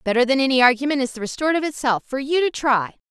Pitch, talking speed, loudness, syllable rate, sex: 265 Hz, 210 wpm, -20 LUFS, 7.3 syllables/s, female